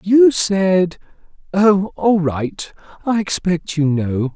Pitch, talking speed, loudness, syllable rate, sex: 185 Hz, 110 wpm, -17 LUFS, 3.0 syllables/s, male